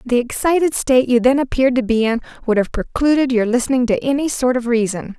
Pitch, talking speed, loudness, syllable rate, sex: 250 Hz, 220 wpm, -17 LUFS, 6.2 syllables/s, female